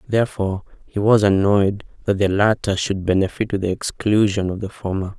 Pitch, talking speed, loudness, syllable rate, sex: 100 Hz, 175 wpm, -20 LUFS, 5.4 syllables/s, male